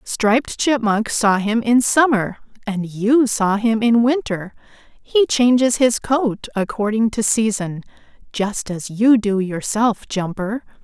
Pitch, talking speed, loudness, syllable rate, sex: 220 Hz, 140 wpm, -18 LUFS, 3.8 syllables/s, female